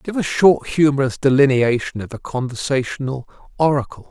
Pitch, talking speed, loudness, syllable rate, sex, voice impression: 135 Hz, 130 wpm, -18 LUFS, 5.3 syllables/s, male, very masculine, middle-aged, thick, tensed, powerful, very bright, soft, very clear, very fluent, slightly raspy, cool, very intellectual, very refreshing, sincere, slightly calm, friendly, reassuring, very unique, slightly elegant, wild, sweet, very lively, kind, slightly intense